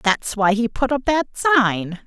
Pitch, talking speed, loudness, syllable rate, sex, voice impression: 235 Hz, 205 wpm, -19 LUFS, 4.4 syllables/s, female, very feminine, slightly young, slightly adult-like, thin, slightly relaxed, slightly weak, bright, slightly hard, clear, fluent, cute, slightly cool, intellectual, refreshing, slightly sincere, slightly calm, friendly, reassuring, unique, slightly elegant, slightly wild, sweet, lively, kind, slightly intense, slightly modest, light